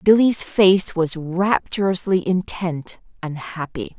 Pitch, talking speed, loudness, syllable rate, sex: 180 Hz, 105 wpm, -20 LUFS, 3.5 syllables/s, female